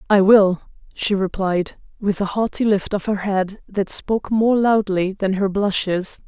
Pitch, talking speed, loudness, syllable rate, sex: 200 Hz, 170 wpm, -19 LUFS, 4.2 syllables/s, female